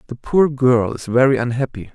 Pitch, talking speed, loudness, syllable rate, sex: 125 Hz, 185 wpm, -17 LUFS, 5.2 syllables/s, male